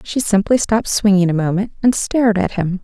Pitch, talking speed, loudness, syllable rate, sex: 205 Hz, 210 wpm, -16 LUFS, 5.7 syllables/s, female